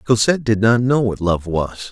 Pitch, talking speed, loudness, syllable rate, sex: 110 Hz, 220 wpm, -17 LUFS, 5.0 syllables/s, male